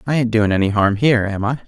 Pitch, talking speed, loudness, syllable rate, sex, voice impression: 115 Hz, 285 wpm, -17 LUFS, 6.8 syllables/s, male, very masculine, old, very thick, very relaxed, very weak, dark, very soft, muffled, fluent, cool, very intellectual, very sincere, very calm, very mature, friendly, very reassuring, unique, elegant, slightly wild, sweet, slightly lively, very kind, very modest